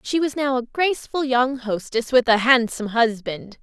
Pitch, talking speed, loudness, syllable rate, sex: 245 Hz, 180 wpm, -20 LUFS, 4.8 syllables/s, female